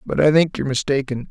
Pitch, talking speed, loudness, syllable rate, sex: 130 Hz, 230 wpm, -19 LUFS, 5.8 syllables/s, male